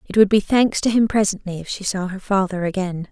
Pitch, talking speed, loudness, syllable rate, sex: 195 Hz, 250 wpm, -19 LUFS, 5.7 syllables/s, female